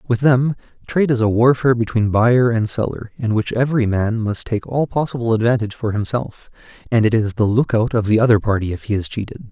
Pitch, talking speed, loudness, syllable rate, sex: 115 Hz, 215 wpm, -18 LUFS, 6.0 syllables/s, male